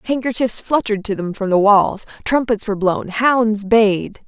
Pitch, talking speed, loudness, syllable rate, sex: 215 Hz, 170 wpm, -17 LUFS, 4.7 syllables/s, female